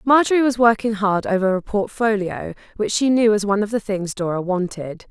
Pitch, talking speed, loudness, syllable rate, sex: 210 Hz, 200 wpm, -19 LUFS, 5.5 syllables/s, female